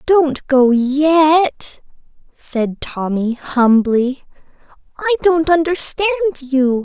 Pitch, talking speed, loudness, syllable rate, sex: 290 Hz, 90 wpm, -15 LUFS, 2.7 syllables/s, female